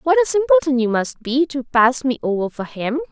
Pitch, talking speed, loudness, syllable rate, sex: 270 Hz, 230 wpm, -18 LUFS, 5.2 syllables/s, female